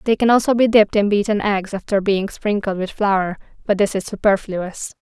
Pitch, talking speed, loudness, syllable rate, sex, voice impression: 205 Hz, 200 wpm, -18 LUFS, 5.3 syllables/s, female, feminine, adult-like, tensed, clear, fluent, intellectual, friendly, elegant, sharp